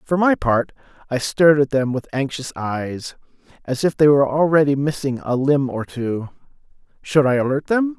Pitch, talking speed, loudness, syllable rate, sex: 140 Hz, 180 wpm, -19 LUFS, 5.0 syllables/s, male